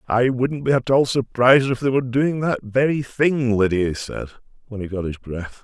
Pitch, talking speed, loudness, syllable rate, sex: 125 Hz, 225 wpm, -20 LUFS, 5.2 syllables/s, male